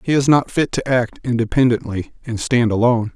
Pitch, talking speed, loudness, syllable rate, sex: 120 Hz, 190 wpm, -18 LUFS, 5.6 syllables/s, male